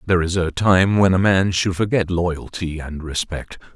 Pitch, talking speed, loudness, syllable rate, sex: 90 Hz, 190 wpm, -19 LUFS, 4.6 syllables/s, male